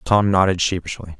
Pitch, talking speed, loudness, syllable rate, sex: 90 Hz, 150 wpm, -18 LUFS, 5.5 syllables/s, male